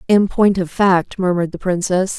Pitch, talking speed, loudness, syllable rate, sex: 185 Hz, 190 wpm, -17 LUFS, 5.0 syllables/s, female